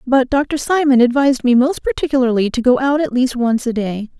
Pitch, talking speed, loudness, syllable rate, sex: 255 Hz, 215 wpm, -15 LUFS, 5.7 syllables/s, female